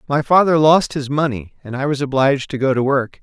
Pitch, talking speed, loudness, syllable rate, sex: 140 Hz, 240 wpm, -16 LUFS, 5.7 syllables/s, male